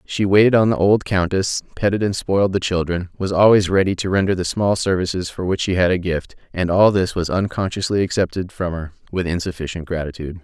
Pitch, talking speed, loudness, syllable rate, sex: 95 Hz, 205 wpm, -19 LUFS, 5.8 syllables/s, male